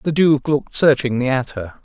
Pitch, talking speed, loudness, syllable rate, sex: 135 Hz, 195 wpm, -17 LUFS, 5.3 syllables/s, male